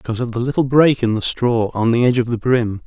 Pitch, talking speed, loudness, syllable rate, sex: 120 Hz, 295 wpm, -17 LUFS, 6.4 syllables/s, male